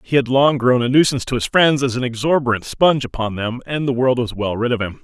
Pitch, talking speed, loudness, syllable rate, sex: 125 Hz, 275 wpm, -17 LUFS, 6.1 syllables/s, male